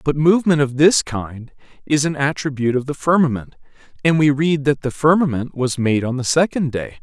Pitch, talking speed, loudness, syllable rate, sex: 140 Hz, 195 wpm, -18 LUFS, 5.4 syllables/s, male